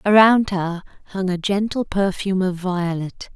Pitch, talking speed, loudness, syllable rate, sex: 190 Hz, 145 wpm, -20 LUFS, 4.5 syllables/s, female